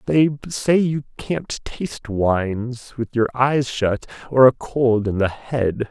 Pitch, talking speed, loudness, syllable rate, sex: 125 Hz, 160 wpm, -20 LUFS, 3.6 syllables/s, male